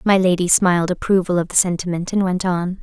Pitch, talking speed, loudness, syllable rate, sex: 180 Hz, 210 wpm, -18 LUFS, 5.9 syllables/s, female